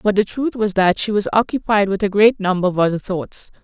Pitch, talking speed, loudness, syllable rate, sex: 200 Hz, 245 wpm, -17 LUFS, 5.6 syllables/s, female